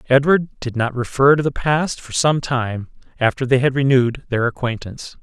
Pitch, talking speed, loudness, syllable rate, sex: 130 Hz, 185 wpm, -18 LUFS, 5.2 syllables/s, male